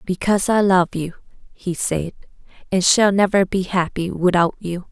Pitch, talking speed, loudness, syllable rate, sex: 185 Hz, 160 wpm, -18 LUFS, 4.7 syllables/s, female